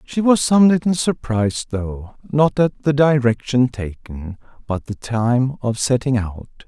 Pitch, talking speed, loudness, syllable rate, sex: 125 Hz, 155 wpm, -18 LUFS, 4.1 syllables/s, male